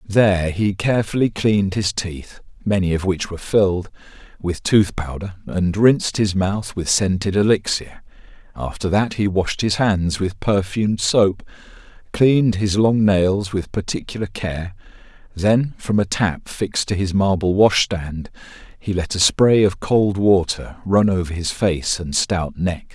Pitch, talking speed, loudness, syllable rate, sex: 95 Hz, 155 wpm, -19 LUFS, 4.3 syllables/s, male